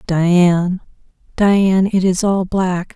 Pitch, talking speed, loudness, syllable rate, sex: 185 Hz, 120 wpm, -15 LUFS, 3.5 syllables/s, female